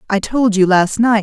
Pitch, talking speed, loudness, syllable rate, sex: 210 Hz, 245 wpm, -14 LUFS, 4.6 syllables/s, female